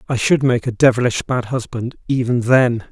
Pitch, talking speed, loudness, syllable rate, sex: 120 Hz, 185 wpm, -17 LUFS, 4.9 syllables/s, male